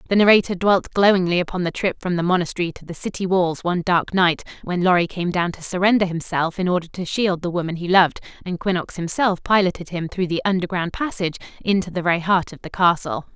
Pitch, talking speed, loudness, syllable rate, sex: 180 Hz, 215 wpm, -20 LUFS, 6.2 syllables/s, female